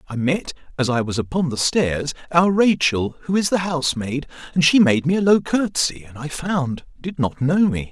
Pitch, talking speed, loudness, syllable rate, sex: 155 Hz, 220 wpm, -20 LUFS, 5.0 syllables/s, male